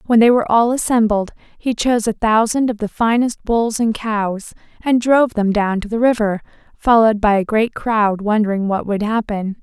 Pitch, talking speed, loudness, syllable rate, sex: 220 Hz, 195 wpm, -17 LUFS, 5.1 syllables/s, female